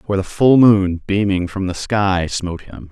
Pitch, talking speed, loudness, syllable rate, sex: 100 Hz, 205 wpm, -16 LUFS, 4.4 syllables/s, male